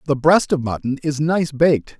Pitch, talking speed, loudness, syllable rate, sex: 145 Hz, 210 wpm, -18 LUFS, 5.1 syllables/s, male